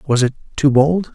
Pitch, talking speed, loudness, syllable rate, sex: 140 Hz, 210 wpm, -16 LUFS, 4.5 syllables/s, male